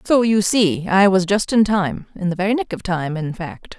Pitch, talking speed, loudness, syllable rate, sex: 195 Hz, 255 wpm, -18 LUFS, 4.7 syllables/s, female